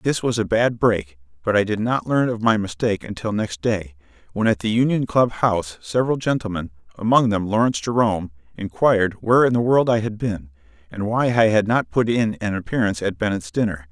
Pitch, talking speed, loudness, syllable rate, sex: 105 Hz, 205 wpm, -20 LUFS, 5.7 syllables/s, male